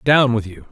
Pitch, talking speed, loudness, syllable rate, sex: 115 Hz, 255 wpm, -17 LUFS, 4.9 syllables/s, male